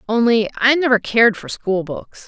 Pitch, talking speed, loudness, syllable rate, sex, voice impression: 225 Hz, 160 wpm, -16 LUFS, 5.0 syllables/s, female, feminine, adult-like, tensed, powerful, clear, fluent, calm, reassuring, elegant, slightly strict